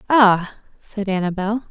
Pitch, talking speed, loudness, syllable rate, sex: 205 Hz, 105 wpm, -19 LUFS, 4.0 syllables/s, female